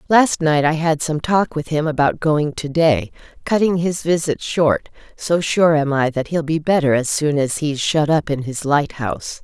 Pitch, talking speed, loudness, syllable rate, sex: 155 Hz, 210 wpm, -18 LUFS, 4.5 syllables/s, female